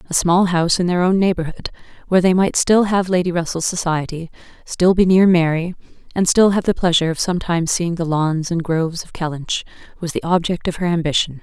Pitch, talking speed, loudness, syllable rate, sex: 175 Hz, 205 wpm, -17 LUFS, 6.0 syllables/s, female